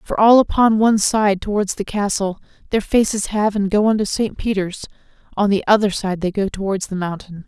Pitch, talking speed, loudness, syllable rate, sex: 205 Hz, 200 wpm, -18 LUFS, 5.4 syllables/s, female